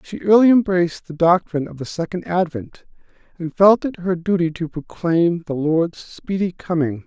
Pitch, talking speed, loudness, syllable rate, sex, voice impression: 170 Hz, 170 wpm, -19 LUFS, 4.8 syllables/s, male, very masculine, very adult-like, old, thick, slightly tensed, slightly weak, slightly bright, slightly soft, slightly clear, slightly fluent, slightly raspy, intellectual, refreshing, slightly sincere, calm, slightly mature, friendly, reassuring, very unique, elegant, slightly sweet, kind, very modest, light